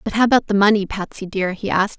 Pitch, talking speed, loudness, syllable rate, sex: 205 Hz, 270 wpm, -18 LUFS, 6.9 syllables/s, female